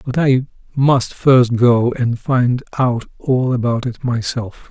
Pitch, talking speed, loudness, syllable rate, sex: 125 Hz, 155 wpm, -16 LUFS, 3.5 syllables/s, male